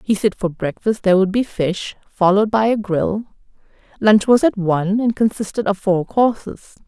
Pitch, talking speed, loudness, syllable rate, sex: 205 Hz, 185 wpm, -17 LUFS, 4.9 syllables/s, female